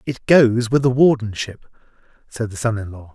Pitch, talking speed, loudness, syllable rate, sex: 115 Hz, 190 wpm, -18 LUFS, 4.9 syllables/s, male